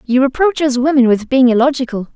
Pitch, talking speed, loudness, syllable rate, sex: 260 Hz, 195 wpm, -13 LUFS, 6.0 syllables/s, female